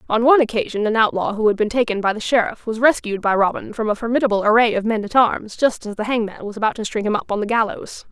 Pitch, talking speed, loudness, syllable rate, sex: 220 Hz, 275 wpm, -19 LUFS, 6.6 syllables/s, female